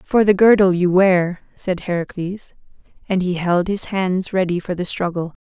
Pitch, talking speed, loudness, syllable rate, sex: 185 Hz, 175 wpm, -18 LUFS, 4.5 syllables/s, female